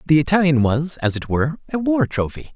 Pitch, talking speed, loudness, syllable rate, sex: 155 Hz, 210 wpm, -19 LUFS, 5.9 syllables/s, male